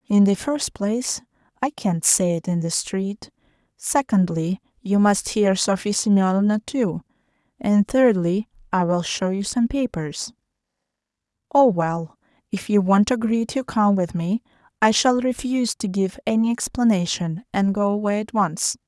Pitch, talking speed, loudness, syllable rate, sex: 205 Hz, 155 wpm, -21 LUFS, 4.4 syllables/s, female